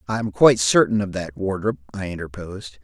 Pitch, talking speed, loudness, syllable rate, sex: 95 Hz, 190 wpm, -20 LUFS, 6.1 syllables/s, male